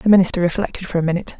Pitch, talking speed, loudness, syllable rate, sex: 180 Hz, 255 wpm, -19 LUFS, 8.9 syllables/s, female